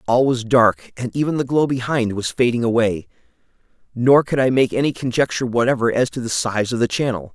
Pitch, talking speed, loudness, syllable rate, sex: 125 Hz, 205 wpm, -19 LUFS, 5.8 syllables/s, male